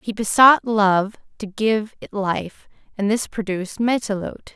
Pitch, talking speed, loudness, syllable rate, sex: 210 Hz, 145 wpm, -20 LUFS, 4.4 syllables/s, female